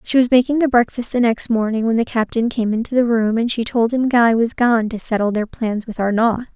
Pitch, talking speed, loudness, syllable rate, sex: 230 Hz, 255 wpm, -17 LUFS, 5.5 syllables/s, female